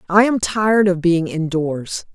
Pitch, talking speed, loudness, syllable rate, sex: 185 Hz, 170 wpm, -18 LUFS, 4.2 syllables/s, female